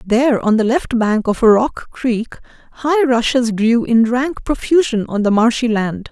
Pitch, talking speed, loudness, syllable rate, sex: 235 Hz, 175 wpm, -15 LUFS, 4.3 syllables/s, female